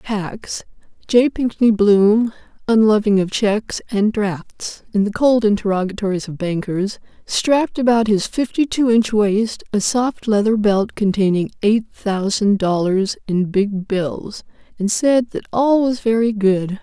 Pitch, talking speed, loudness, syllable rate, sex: 215 Hz, 145 wpm, -18 LUFS, 2.8 syllables/s, female